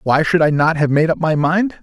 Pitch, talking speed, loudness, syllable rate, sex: 160 Hz, 295 wpm, -15 LUFS, 5.2 syllables/s, male